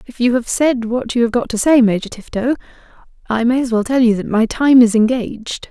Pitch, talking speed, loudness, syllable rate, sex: 235 Hz, 240 wpm, -15 LUFS, 5.6 syllables/s, female